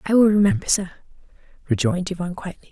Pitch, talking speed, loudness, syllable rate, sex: 195 Hz, 155 wpm, -20 LUFS, 7.6 syllables/s, female